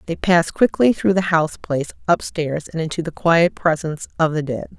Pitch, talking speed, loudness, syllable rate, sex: 165 Hz, 200 wpm, -19 LUFS, 5.5 syllables/s, female